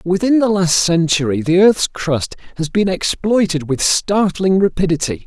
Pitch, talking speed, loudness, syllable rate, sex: 180 Hz, 150 wpm, -15 LUFS, 4.5 syllables/s, male